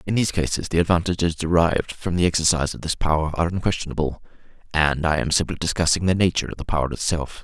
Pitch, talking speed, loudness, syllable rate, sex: 85 Hz, 200 wpm, -22 LUFS, 7.2 syllables/s, male